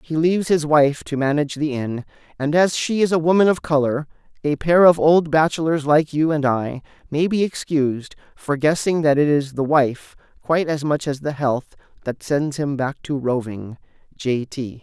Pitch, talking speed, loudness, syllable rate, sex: 150 Hz, 200 wpm, -19 LUFS, 4.8 syllables/s, male